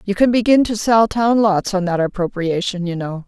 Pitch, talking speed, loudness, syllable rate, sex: 200 Hz, 220 wpm, -17 LUFS, 5.1 syllables/s, female